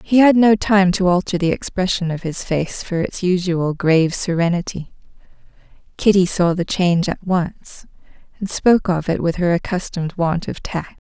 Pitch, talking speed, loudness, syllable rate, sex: 180 Hz, 175 wpm, -18 LUFS, 4.9 syllables/s, female